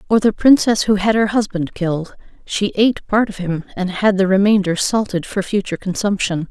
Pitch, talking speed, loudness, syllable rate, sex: 200 Hz, 195 wpm, -17 LUFS, 5.4 syllables/s, female